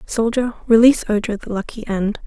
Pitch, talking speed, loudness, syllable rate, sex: 220 Hz, 160 wpm, -18 LUFS, 5.7 syllables/s, female